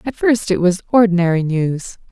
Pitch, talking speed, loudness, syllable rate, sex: 195 Hz, 170 wpm, -16 LUFS, 4.9 syllables/s, female